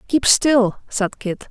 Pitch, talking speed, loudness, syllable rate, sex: 230 Hz, 160 wpm, -18 LUFS, 3.2 syllables/s, female